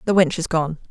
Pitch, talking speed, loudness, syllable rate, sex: 170 Hz, 265 wpm, -20 LUFS, 5.9 syllables/s, female